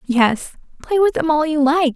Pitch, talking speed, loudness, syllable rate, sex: 300 Hz, 215 wpm, -17 LUFS, 4.6 syllables/s, female